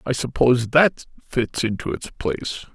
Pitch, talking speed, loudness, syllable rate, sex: 125 Hz, 155 wpm, -21 LUFS, 4.6 syllables/s, male